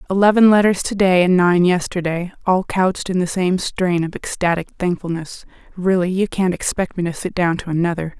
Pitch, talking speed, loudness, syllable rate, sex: 180 Hz, 190 wpm, -18 LUFS, 5.4 syllables/s, female